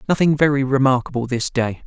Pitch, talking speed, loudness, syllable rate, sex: 135 Hz, 160 wpm, -18 LUFS, 6.0 syllables/s, male